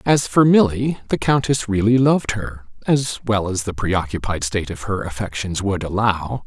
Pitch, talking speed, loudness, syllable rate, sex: 105 Hz, 175 wpm, -19 LUFS, 4.9 syllables/s, male